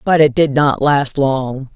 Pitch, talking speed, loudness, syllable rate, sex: 140 Hz, 205 wpm, -14 LUFS, 3.7 syllables/s, female